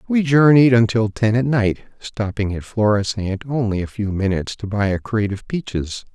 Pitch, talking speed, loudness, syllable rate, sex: 110 Hz, 185 wpm, -19 LUFS, 5.2 syllables/s, male